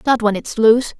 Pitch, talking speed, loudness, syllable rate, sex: 230 Hz, 240 wpm, -15 LUFS, 5.9 syllables/s, female